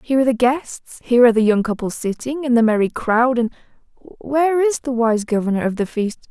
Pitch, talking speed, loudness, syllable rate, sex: 245 Hz, 220 wpm, -18 LUFS, 5.8 syllables/s, female